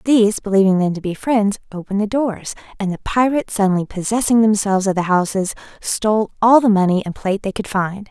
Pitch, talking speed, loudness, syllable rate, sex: 205 Hz, 200 wpm, -17 LUFS, 6.1 syllables/s, female